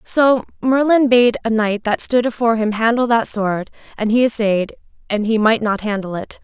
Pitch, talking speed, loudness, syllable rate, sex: 225 Hz, 195 wpm, -17 LUFS, 4.9 syllables/s, female